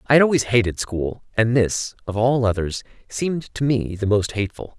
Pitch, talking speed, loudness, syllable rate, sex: 115 Hz, 200 wpm, -21 LUFS, 5.2 syllables/s, male